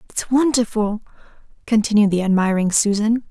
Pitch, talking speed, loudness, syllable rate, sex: 215 Hz, 110 wpm, -18 LUFS, 5.3 syllables/s, female